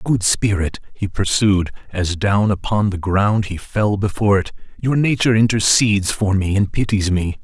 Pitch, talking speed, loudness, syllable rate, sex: 100 Hz, 170 wpm, -18 LUFS, 4.8 syllables/s, male